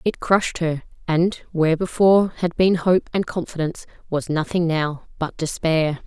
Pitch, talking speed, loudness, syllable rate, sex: 170 Hz, 160 wpm, -21 LUFS, 4.8 syllables/s, female